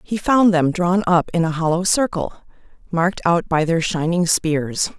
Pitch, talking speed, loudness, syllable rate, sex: 175 Hz, 180 wpm, -18 LUFS, 4.5 syllables/s, female